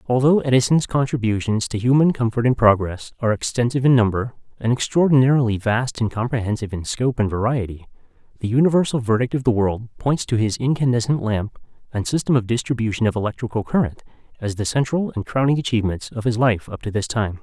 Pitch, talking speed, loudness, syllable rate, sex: 120 Hz, 180 wpm, -20 LUFS, 6.3 syllables/s, male